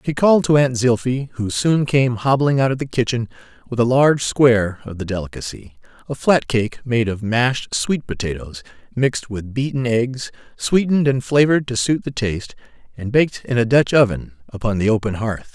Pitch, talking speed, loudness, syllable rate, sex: 120 Hz, 185 wpm, -18 LUFS, 5.3 syllables/s, male